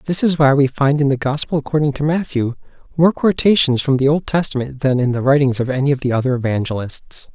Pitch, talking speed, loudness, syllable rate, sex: 140 Hz, 220 wpm, -17 LUFS, 6.0 syllables/s, male